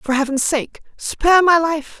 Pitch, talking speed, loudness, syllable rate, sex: 305 Hz, 180 wpm, -16 LUFS, 4.5 syllables/s, female